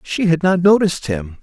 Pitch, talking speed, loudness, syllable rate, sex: 165 Hz, 210 wpm, -16 LUFS, 5.3 syllables/s, male